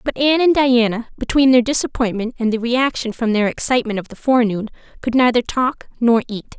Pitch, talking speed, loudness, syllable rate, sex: 240 Hz, 190 wpm, -17 LUFS, 6.0 syllables/s, female